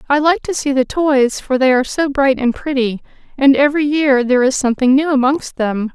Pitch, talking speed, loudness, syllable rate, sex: 270 Hz, 220 wpm, -15 LUFS, 5.5 syllables/s, female